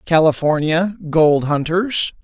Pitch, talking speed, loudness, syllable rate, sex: 165 Hz, 80 wpm, -17 LUFS, 3.7 syllables/s, male